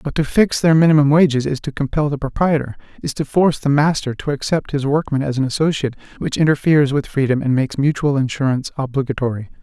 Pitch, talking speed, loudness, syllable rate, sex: 145 Hz, 200 wpm, -18 LUFS, 6.5 syllables/s, male